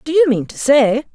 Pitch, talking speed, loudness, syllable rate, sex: 270 Hz, 260 wpm, -15 LUFS, 5.1 syllables/s, female